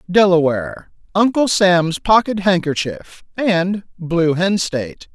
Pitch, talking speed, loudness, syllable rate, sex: 180 Hz, 105 wpm, -17 LUFS, 3.8 syllables/s, male